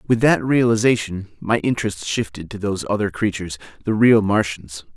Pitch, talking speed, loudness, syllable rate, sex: 105 Hz, 155 wpm, -20 LUFS, 5.4 syllables/s, male